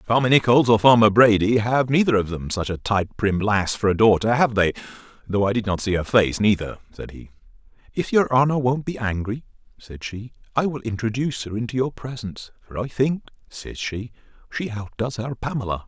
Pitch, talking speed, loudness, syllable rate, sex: 110 Hz, 195 wpm, -21 LUFS, 5.4 syllables/s, male